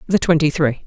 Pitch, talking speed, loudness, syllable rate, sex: 155 Hz, 210 wpm, -17 LUFS, 5.6 syllables/s, male